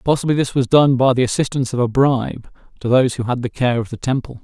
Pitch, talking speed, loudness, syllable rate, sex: 125 Hz, 255 wpm, -17 LUFS, 6.7 syllables/s, male